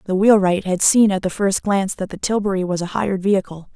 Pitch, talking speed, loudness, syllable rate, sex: 195 Hz, 240 wpm, -18 LUFS, 6.2 syllables/s, female